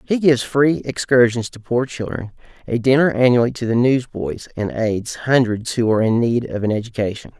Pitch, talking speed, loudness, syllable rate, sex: 120 Hz, 185 wpm, -18 LUFS, 5.3 syllables/s, male